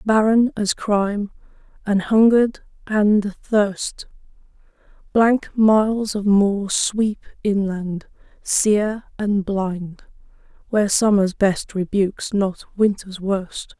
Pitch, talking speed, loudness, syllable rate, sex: 205 Hz, 95 wpm, -19 LUFS, 3.4 syllables/s, female